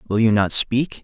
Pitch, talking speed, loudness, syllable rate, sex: 115 Hz, 235 wpm, -18 LUFS, 4.0 syllables/s, male